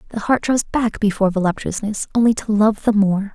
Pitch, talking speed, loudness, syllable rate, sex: 210 Hz, 200 wpm, -18 LUFS, 5.7 syllables/s, female